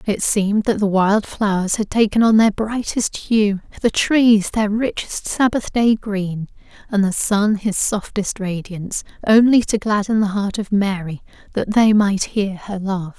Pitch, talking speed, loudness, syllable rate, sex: 205 Hz, 175 wpm, -18 LUFS, 4.2 syllables/s, female